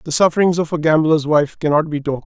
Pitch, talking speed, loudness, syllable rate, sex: 155 Hz, 235 wpm, -16 LUFS, 6.1 syllables/s, male